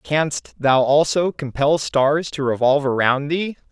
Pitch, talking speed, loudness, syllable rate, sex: 145 Hz, 145 wpm, -19 LUFS, 4.0 syllables/s, male